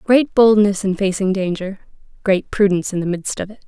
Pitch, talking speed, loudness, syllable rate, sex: 195 Hz, 195 wpm, -17 LUFS, 5.4 syllables/s, female